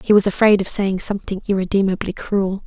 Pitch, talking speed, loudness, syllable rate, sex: 195 Hz, 180 wpm, -19 LUFS, 6.0 syllables/s, female